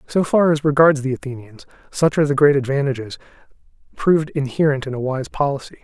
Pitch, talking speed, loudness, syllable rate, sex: 140 Hz, 175 wpm, -18 LUFS, 6.2 syllables/s, male